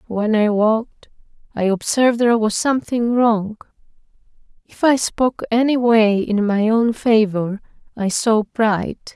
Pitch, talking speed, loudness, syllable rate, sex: 220 Hz, 140 wpm, -17 LUFS, 4.5 syllables/s, female